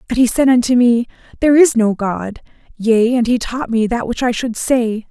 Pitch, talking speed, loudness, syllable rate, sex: 235 Hz, 225 wpm, -15 LUFS, 5.0 syllables/s, female